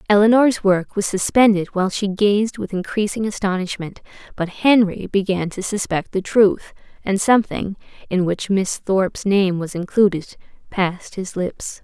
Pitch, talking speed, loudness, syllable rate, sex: 195 Hz, 145 wpm, -19 LUFS, 4.6 syllables/s, female